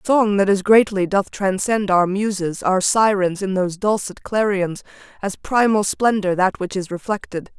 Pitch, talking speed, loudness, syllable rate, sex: 195 Hz, 165 wpm, -19 LUFS, 4.6 syllables/s, female